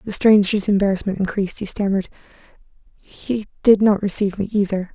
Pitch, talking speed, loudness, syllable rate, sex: 200 Hz, 145 wpm, -19 LUFS, 6.1 syllables/s, female